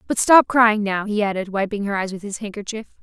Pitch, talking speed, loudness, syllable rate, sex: 205 Hz, 240 wpm, -19 LUFS, 5.7 syllables/s, female